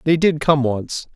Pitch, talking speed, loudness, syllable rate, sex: 145 Hz, 210 wpm, -18 LUFS, 4.0 syllables/s, male